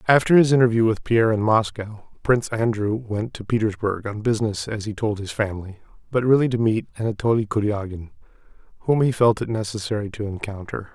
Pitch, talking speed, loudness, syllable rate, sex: 110 Hz, 175 wpm, -22 LUFS, 5.9 syllables/s, male